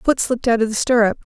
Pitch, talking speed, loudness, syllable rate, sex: 235 Hz, 270 wpm, -18 LUFS, 7.2 syllables/s, female